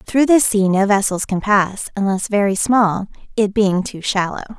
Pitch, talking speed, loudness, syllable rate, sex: 205 Hz, 185 wpm, -17 LUFS, 4.6 syllables/s, female